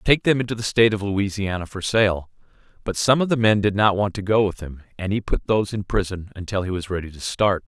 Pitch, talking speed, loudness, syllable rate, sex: 100 Hz, 280 wpm, -22 LUFS, 6.5 syllables/s, male